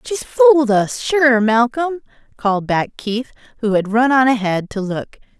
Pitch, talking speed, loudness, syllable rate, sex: 240 Hz, 165 wpm, -16 LUFS, 4.7 syllables/s, female